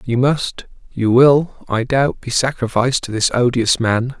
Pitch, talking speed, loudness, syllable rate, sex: 125 Hz, 170 wpm, -16 LUFS, 4.4 syllables/s, male